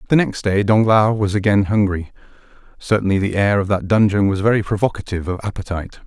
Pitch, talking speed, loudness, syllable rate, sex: 100 Hz, 180 wpm, -18 LUFS, 6.4 syllables/s, male